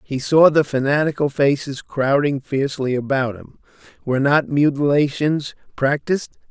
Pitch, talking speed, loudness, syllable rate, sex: 140 Hz, 120 wpm, -19 LUFS, 4.8 syllables/s, male